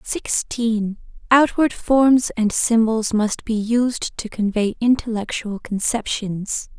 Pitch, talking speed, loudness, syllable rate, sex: 225 Hz, 105 wpm, -20 LUFS, 3.4 syllables/s, female